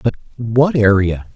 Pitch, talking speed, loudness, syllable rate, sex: 110 Hz, 135 wpm, -15 LUFS, 4.0 syllables/s, male